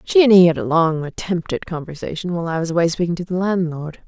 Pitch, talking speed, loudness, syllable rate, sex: 170 Hz, 250 wpm, -18 LUFS, 6.4 syllables/s, female